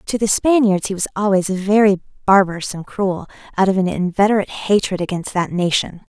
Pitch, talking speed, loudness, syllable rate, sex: 195 Hz, 175 wpm, -17 LUFS, 5.6 syllables/s, female